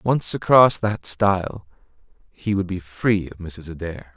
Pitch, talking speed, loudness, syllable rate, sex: 95 Hz, 160 wpm, -21 LUFS, 4.0 syllables/s, male